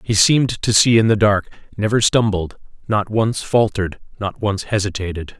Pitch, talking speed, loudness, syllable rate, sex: 105 Hz, 165 wpm, -18 LUFS, 5.1 syllables/s, male